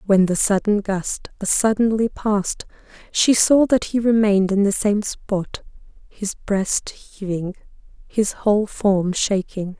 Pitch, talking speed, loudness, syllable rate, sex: 205 Hz, 140 wpm, -20 LUFS, 4.0 syllables/s, female